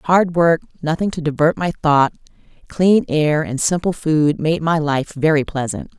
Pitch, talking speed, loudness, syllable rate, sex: 160 Hz, 170 wpm, -17 LUFS, 4.4 syllables/s, female